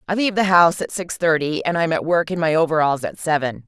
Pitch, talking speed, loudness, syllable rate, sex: 165 Hz, 260 wpm, -19 LUFS, 6.3 syllables/s, female